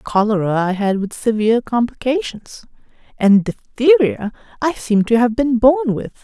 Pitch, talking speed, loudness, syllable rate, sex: 235 Hz, 145 wpm, -16 LUFS, 4.7 syllables/s, female